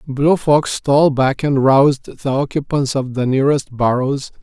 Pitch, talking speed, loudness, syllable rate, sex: 135 Hz, 165 wpm, -16 LUFS, 4.5 syllables/s, male